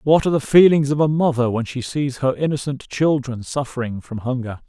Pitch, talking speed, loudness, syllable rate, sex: 135 Hz, 205 wpm, -19 LUFS, 5.5 syllables/s, male